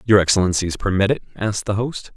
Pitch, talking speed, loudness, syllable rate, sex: 100 Hz, 195 wpm, -20 LUFS, 6.4 syllables/s, male